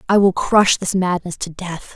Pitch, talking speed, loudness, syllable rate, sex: 185 Hz, 215 wpm, -17 LUFS, 4.5 syllables/s, female